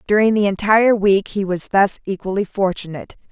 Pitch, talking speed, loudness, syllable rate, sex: 200 Hz, 165 wpm, -17 LUFS, 5.7 syllables/s, female